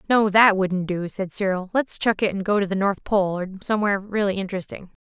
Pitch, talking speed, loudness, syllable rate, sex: 195 Hz, 225 wpm, -22 LUFS, 5.9 syllables/s, female